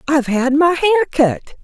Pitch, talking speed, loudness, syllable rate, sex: 295 Hz, 185 wpm, -15 LUFS, 5.9 syllables/s, female